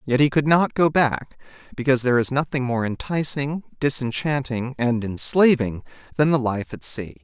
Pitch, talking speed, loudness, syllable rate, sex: 130 Hz, 165 wpm, -21 LUFS, 5.0 syllables/s, male